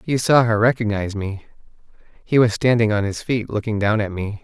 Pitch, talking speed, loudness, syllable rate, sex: 110 Hz, 205 wpm, -19 LUFS, 5.5 syllables/s, male